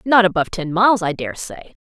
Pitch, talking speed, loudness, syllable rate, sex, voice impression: 205 Hz, 230 wpm, -18 LUFS, 6.0 syllables/s, female, feminine, adult-like, tensed, powerful, bright, clear, slightly raspy, intellectual, friendly, lively, slightly intense, slightly light